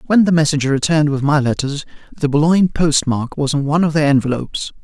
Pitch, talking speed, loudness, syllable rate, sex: 150 Hz, 200 wpm, -16 LUFS, 6.5 syllables/s, male